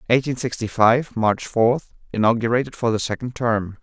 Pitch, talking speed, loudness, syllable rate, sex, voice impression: 115 Hz, 140 wpm, -21 LUFS, 5.3 syllables/s, male, masculine, adult-like, slightly tensed, powerful, slightly bright, clear, slightly halting, intellectual, slightly refreshing, calm, friendly, reassuring, slightly wild, slightly lively, kind, slightly modest